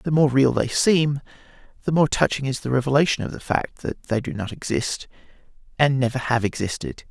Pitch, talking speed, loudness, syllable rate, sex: 135 Hz, 195 wpm, -22 LUFS, 5.4 syllables/s, male